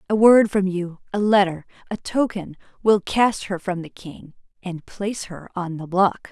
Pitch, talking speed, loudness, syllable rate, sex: 190 Hz, 160 wpm, -21 LUFS, 4.5 syllables/s, female